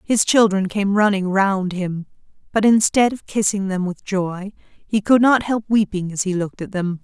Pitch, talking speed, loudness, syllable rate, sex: 200 Hz, 195 wpm, -19 LUFS, 4.6 syllables/s, female